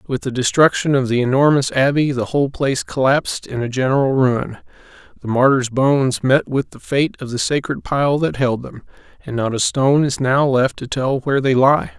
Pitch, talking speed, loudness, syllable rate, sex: 135 Hz, 205 wpm, -17 LUFS, 5.2 syllables/s, male